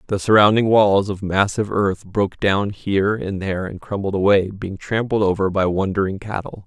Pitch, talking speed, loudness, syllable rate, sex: 100 Hz, 180 wpm, -19 LUFS, 5.3 syllables/s, male